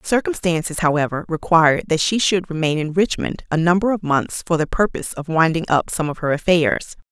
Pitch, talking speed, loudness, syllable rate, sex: 165 Hz, 195 wpm, -19 LUFS, 5.5 syllables/s, female